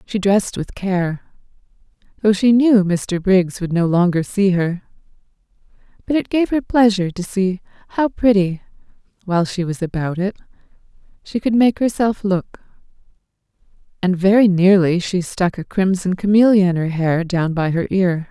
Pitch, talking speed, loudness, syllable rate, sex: 190 Hz, 155 wpm, -17 LUFS, 4.7 syllables/s, female